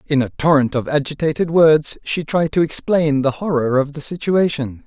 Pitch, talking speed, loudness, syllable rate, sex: 150 Hz, 185 wpm, -18 LUFS, 4.9 syllables/s, male